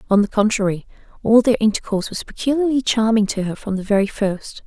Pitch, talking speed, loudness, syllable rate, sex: 215 Hz, 195 wpm, -19 LUFS, 6.1 syllables/s, female